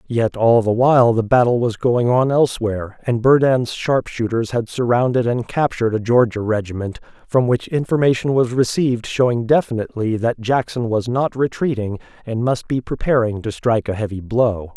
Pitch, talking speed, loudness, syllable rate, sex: 120 Hz, 165 wpm, -18 LUFS, 5.2 syllables/s, male